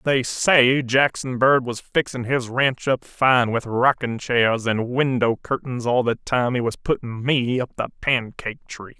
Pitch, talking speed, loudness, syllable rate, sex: 125 Hz, 180 wpm, -21 LUFS, 4.1 syllables/s, male